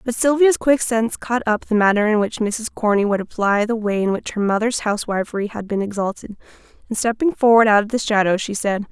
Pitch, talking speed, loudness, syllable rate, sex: 215 Hz, 220 wpm, -19 LUFS, 5.8 syllables/s, female